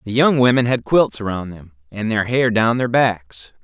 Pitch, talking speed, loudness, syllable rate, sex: 115 Hz, 215 wpm, -17 LUFS, 4.6 syllables/s, male